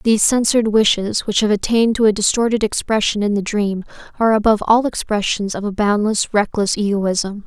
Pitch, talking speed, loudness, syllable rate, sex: 210 Hz, 175 wpm, -17 LUFS, 5.7 syllables/s, female